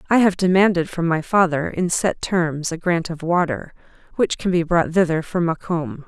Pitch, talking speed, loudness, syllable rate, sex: 170 Hz, 200 wpm, -20 LUFS, 5.0 syllables/s, female